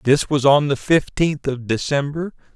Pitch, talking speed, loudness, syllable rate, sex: 145 Hz, 165 wpm, -19 LUFS, 4.5 syllables/s, male